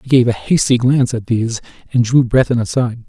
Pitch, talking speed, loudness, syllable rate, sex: 120 Hz, 215 wpm, -15 LUFS, 6.4 syllables/s, male